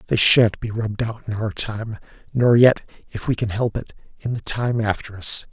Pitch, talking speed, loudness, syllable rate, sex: 110 Hz, 215 wpm, -20 LUFS, 4.9 syllables/s, male